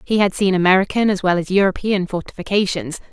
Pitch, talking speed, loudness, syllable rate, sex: 190 Hz, 175 wpm, -18 LUFS, 6.2 syllables/s, female